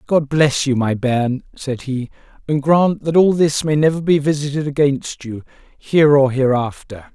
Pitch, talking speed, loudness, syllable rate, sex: 140 Hz, 175 wpm, -17 LUFS, 4.5 syllables/s, male